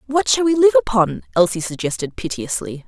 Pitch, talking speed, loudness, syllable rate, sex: 225 Hz, 165 wpm, -18 LUFS, 5.5 syllables/s, female